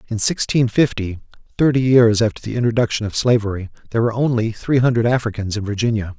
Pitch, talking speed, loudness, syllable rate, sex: 115 Hz, 175 wpm, -18 LUFS, 6.5 syllables/s, male